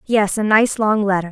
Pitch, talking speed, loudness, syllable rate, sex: 205 Hz, 230 wpm, -16 LUFS, 5.1 syllables/s, female